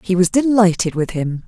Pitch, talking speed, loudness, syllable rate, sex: 185 Hz, 205 wpm, -16 LUFS, 5.1 syllables/s, female